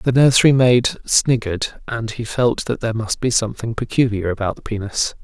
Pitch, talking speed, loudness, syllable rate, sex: 115 Hz, 185 wpm, -18 LUFS, 5.4 syllables/s, male